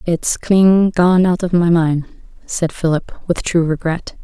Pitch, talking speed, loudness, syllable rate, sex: 170 Hz, 170 wpm, -16 LUFS, 3.8 syllables/s, female